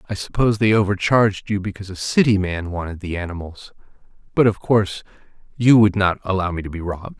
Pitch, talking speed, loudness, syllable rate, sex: 100 Hz, 190 wpm, -19 LUFS, 6.4 syllables/s, male